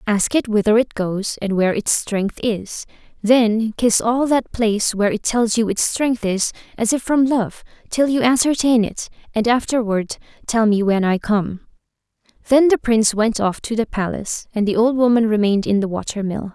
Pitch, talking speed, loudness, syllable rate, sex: 225 Hz, 195 wpm, -18 LUFS, 4.9 syllables/s, female